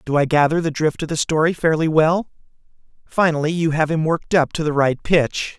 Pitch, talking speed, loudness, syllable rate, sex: 155 Hz, 215 wpm, -19 LUFS, 5.5 syllables/s, male